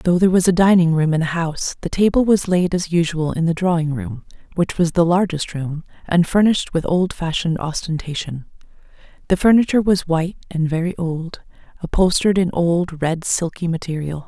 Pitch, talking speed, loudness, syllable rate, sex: 170 Hz, 175 wpm, -18 LUFS, 5.6 syllables/s, female